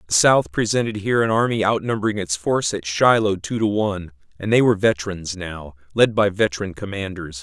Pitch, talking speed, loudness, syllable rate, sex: 100 Hz, 185 wpm, -20 LUFS, 5.9 syllables/s, male